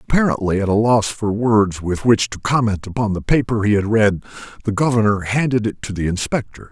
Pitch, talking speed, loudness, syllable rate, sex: 110 Hz, 205 wpm, -18 LUFS, 5.6 syllables/s, male